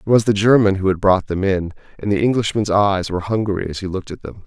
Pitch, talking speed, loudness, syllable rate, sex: 100 Hz, 270 wpm, -18 LUFS, 6.3 syllables/s, male